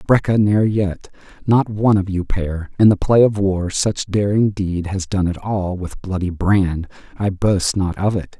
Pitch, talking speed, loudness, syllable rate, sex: 95 Hz, 200 wpm, -18 LUFS, 4.4 syllables/s, male